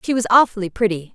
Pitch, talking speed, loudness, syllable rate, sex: 210 Hz, 210 wpm, -17 LUFS, 6.9 syllables/s, female